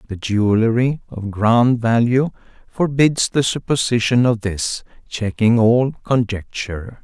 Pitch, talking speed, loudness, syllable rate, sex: 115 Hz, 110 wpm, -18 LUFS, 4.1 syllables/s, male